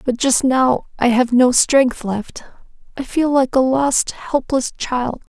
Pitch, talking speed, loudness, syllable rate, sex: 255 Hz, 165 wpm, -17 LUFS, 3.6 syllables/s, female